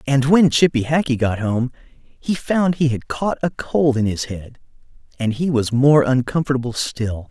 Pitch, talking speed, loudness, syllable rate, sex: 135 Hz, 180 wpm, -19 LUFS, 4.4 syllables/s, male